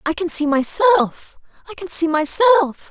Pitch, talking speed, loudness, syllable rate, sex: 340 Hz, 145 wpm, -16 LUFS, 4.8 syllables/s, female